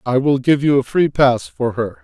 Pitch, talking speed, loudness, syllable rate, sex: 130 Hz, 265 wpm, -16 LUFS, 4.8 syllables/s, male